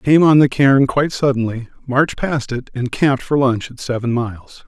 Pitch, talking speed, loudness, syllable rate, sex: 130 Hz, 205 wpm, -17 LUFS, 5.2 syllables/s, male